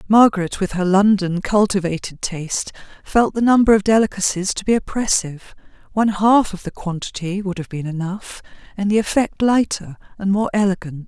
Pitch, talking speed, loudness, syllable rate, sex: 195 Hz, 165 wpm, -19 LUFS, 5.4 syllables/s, female